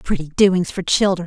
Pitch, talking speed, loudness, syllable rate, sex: 180 Hz, 190 wpm, -18 LUFS, 5.3 syllables/s, female